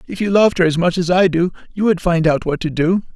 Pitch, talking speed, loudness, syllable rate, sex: 175 Hz, 305 wpm, -16 LUFS, 6.3 syllables/s, male